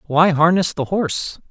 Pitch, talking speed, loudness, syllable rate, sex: 165 Hz, 160 wpm, -17 LUFS, 4.7 syllables/s, male